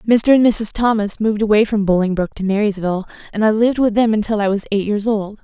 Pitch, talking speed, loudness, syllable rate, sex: 210 Hz, 230 wpm, -17 LUFS, 6.5 syllables/s, female